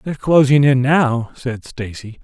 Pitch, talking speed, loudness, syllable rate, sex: 130 Hz, 160 wpm, -15 LUFS, 4.4 syllables/s, male